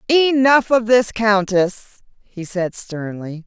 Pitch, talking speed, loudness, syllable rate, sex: 215 Hz, 120 wpm, -17 LUFS, 3.5 syllables/s, female